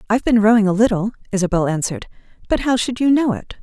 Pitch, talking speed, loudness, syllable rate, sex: 215 Hz, 215 wpm, -17 LUFS, 7.1 syllables/s, female